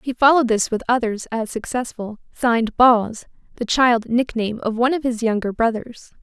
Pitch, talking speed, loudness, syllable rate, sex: 235 Hz, 165 wpm, -19 LUFS, 5.4 syllables/s, female